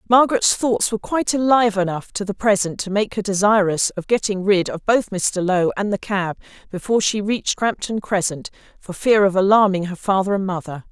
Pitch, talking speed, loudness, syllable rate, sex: 200 Hz, 200 wpm, -19 LUFS, 5.7 syllables/s, female